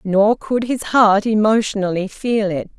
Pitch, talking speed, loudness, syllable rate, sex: 210 Hz, 150 wpm, -17 LUFS, 4.2 syllables/s, female